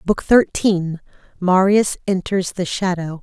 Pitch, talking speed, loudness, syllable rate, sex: 185 Hz, 95 wpm, -18 LUFS, 3.8 syllables/s, female